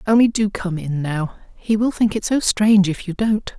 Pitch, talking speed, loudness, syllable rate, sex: 200 Hz, 235 wpm, -19 LUFS, 5.0 syllables/s, female